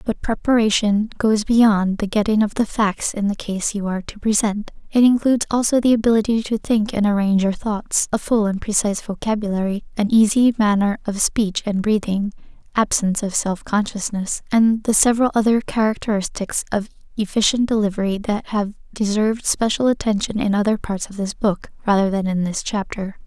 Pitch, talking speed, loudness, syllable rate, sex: 210 Hz, 175 wpm, -19 LUFS, 5.4 syllables/s, female